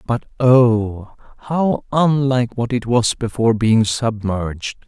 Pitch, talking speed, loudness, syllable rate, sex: 120 Hz, 125 wpm, -17 LUFS, 3.9 syllables/s, male